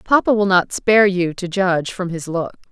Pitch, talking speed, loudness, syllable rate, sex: 190 Hz, 220 wpm, -17 LUFS, 5.2 syllables/s, female